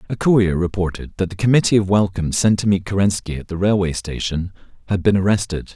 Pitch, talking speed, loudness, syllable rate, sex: 95 Hz, 200 wpm, -19 LUFS, 6.3 syllables/s, male